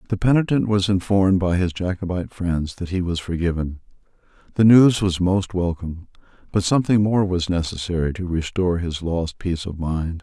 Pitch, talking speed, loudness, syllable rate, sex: 90 Hz, 170 wpm, -21 LUFS, 5.5 syllables/s, male